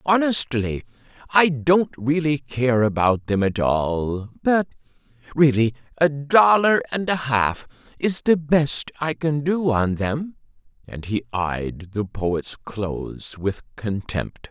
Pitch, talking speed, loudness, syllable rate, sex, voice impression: 130 Hz, 125 wpm, -21 LUFS, 3.4 syllables/s, male, very masculine, very adult-like, very middle-aged, very thick, tensed, slightly powerful, bright, hard, slightly clear, fluent, very cool, very intellectual, slightly refreshing, sincere, very calm, very mature, very friendly, very reassuring, very unique, elegant, slightly wild, sweet, lively, kind, slightly intense